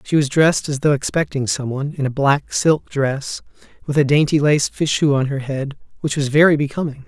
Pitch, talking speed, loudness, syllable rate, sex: 145 Hz, 210 wpm, -18 LUFS, 5.4 syllables/s, male